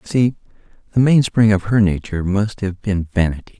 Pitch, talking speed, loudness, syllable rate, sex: 100 Hz, 185 wpm, -17 LUFS, 5.5 syllables/s, male